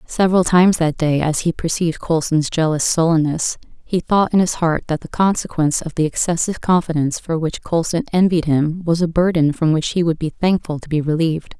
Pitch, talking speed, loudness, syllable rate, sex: 165 Hz, 200 wpm, -18 LUFS, 5.7 syllables/s, female